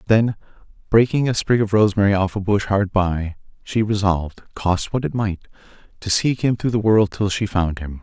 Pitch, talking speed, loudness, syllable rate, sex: 100 Hz, 200 wpm, -19 LUFS, 5.2 syllables/s, male